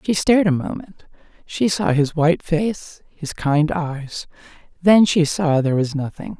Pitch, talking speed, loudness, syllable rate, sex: 175 Hz, 160 wpm, -19 LUFS, 4.4 syllables/s, female